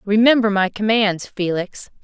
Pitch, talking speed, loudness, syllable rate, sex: 210 Hz, 120 wpm, -18 LUFS, 4.4 syllables/s, female